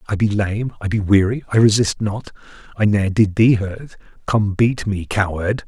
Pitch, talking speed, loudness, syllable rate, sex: 105 Hz, 180 wpm, -18 LUFS, 4.7 syllables/s, male